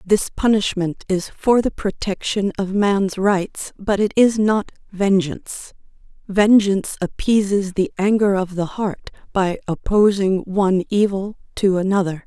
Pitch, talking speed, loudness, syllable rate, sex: 195 Hz, 130 wpm, -19 LUFS, 4.2 syllables/s, female